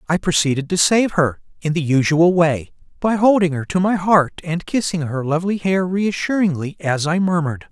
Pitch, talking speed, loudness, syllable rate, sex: 170 Hz, 185 wpm, -18 LUFS, 5.2 syllables/s, male